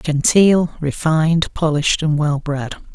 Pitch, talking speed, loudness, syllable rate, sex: 155 Hz, 120 wpm, -17 LUFS, 4.1 syllables/s, male